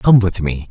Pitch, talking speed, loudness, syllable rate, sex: 95 Hz, 255 wpm, -16 LUFS, 4.5 syllables/s, male